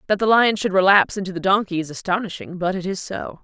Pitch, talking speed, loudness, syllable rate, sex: 190 Hz, 245 wpm, -20 LUFS, 6.5 syllables/s, female